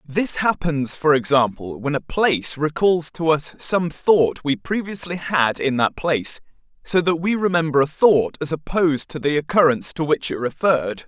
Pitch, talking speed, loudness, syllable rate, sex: 155 Hz, 180 wpm, -20 LUFS, 4.8 syllables/s, male